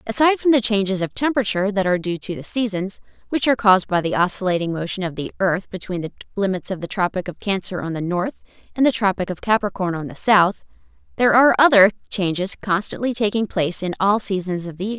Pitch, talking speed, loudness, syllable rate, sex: 200 Hz, 215 wpm, -20 LUFS, 6.5 syllables/s, female